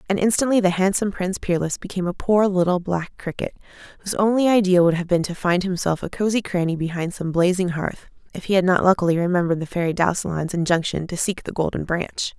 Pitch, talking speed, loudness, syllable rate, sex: 180 Hz, 210 wpm, -21 LUFS, 6.4 syllables/s, female